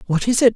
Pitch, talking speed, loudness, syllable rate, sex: 215 Hz, 325 wpm, -17 LUFS, 6.8 syllables/s, male